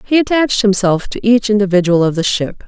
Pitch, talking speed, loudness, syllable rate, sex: 205 Hz, 200 wpm, -14 LUFS, 5.8 syllables/s, female